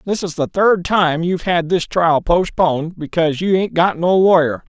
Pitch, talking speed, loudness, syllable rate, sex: 170 Hz, 200 wpm, -16 LUFS, 4.9 syllables/s, male